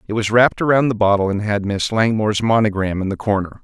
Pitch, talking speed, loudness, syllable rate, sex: 105 Hz, 230 wpm, -17 LUFS, 6.4 syllables/s, male